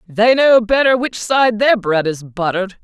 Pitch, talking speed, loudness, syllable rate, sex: 215 Hz, 190 wpm, -14 LUFS, 4.5 syllables/s, female